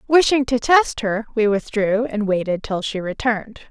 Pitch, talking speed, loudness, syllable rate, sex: 225 Hz, 180 wpm, -19 LUFS, 4.8 syllables/s, female